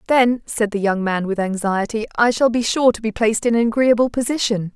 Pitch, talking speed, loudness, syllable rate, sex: 220 Hz, 225 wpm, -18 LUFS, 5.7 syllables/s, female